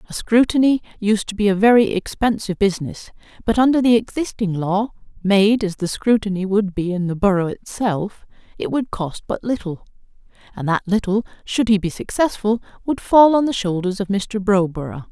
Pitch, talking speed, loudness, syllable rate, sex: 205 Hz, 175 wpm, -19 LUFS, 5.2 syllables/s, female